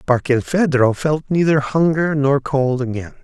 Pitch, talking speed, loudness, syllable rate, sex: 140 Hz, 130 wpm, -17 LUFS, 4.4 syllables/s, male